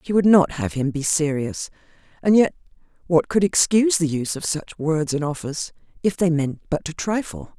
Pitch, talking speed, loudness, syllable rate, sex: 165 Hz, 200 wpm, -21 LUFS, 5.2 syllables/s, female